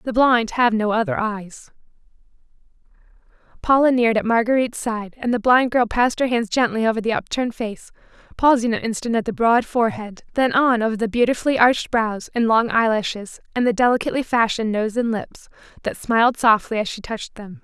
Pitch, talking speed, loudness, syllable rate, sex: 230 Hz, 185 wpm, -19 LUFS, 5.8 syllables/s, female